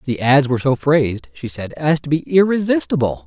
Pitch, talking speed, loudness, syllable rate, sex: 140 Hz, 200 wpm, -17 LUFS, 5.5 syllables/s, male